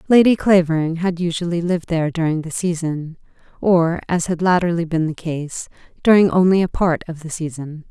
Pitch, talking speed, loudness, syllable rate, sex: 170 Hz, 175 wpm, -18 LUFS, 5.4 syllables/s, female